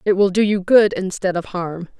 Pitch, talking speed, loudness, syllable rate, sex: 190 Hz, 240 wpm, -18 LUFS, 5.0 syllables/s, female